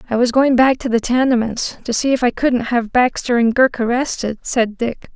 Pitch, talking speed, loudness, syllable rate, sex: 240 Hz, 220 wpm, -17 LUFS, 5.0 syllables/s, female